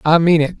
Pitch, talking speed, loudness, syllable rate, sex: 165 Hz, 300 wpm, -14 LUFS, 6.1 syllables/s, male